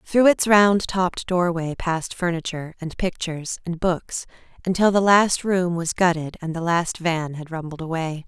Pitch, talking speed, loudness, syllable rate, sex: 175 Hz, 175 wpm, -22 LUFS, 4.7 syllables/s, female